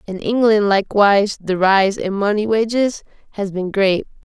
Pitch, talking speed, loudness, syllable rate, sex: 205 Hz, 150 wpm, -17 LUFS, 4.7 syllables/s, female